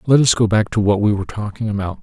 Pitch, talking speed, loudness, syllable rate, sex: 105 Hz, 295 wpm, -17 LUFS, 6.9 syllables/s, male